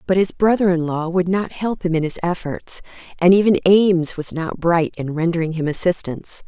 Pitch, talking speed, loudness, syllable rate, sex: 175 Hz, 205 wpm, -19 LUFS, 5.3 syllables/s, female